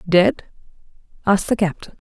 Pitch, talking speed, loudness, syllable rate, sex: 185 Hz, 115 wpm, -19 LUFS, 5.7 syllables/s, female